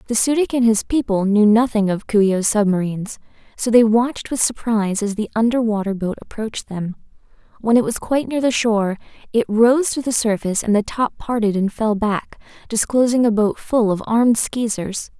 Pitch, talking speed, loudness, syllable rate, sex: 220 Hz, 200 wpm, -18 LUFS, 5.5 syllables/s, female